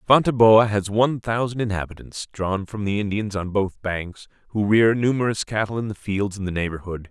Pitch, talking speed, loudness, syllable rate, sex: 105 Hz, 185 wpm, -22 LUFS, 5.3 syllables/s, male